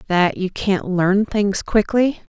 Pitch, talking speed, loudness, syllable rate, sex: 200 Hz, 150 wpm, -19 LUFS, 3.4 syllables/s, female